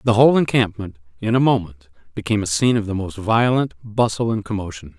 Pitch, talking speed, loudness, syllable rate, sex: 105 Hz, 195 wpm, -19 LUFS, 6.1 syllables/s, male